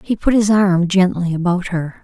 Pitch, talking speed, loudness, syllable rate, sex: 185 Hz, 205 wpm, -16 LUFS, 4.7 syllables/s, female